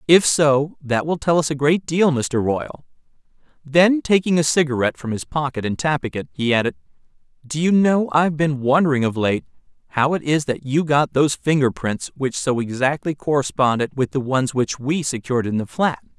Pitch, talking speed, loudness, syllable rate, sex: 140 Hz, 195 wpm, -20 LUFS, 5.3 syllables/s, male